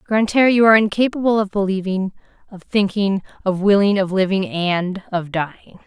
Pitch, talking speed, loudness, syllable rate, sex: 200 Hz, 155 wpm, -18 LUFS, 5.8 syllables/s, female